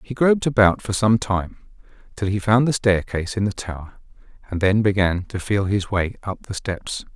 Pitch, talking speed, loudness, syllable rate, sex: 100 Hz, 200 wpm, -21 LUFS, 5.2 syllables/s, male